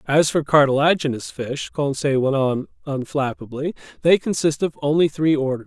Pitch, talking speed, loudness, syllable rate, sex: 145 Hz, 150 wpm, -20 LUFS, 5.1 syllables/s, male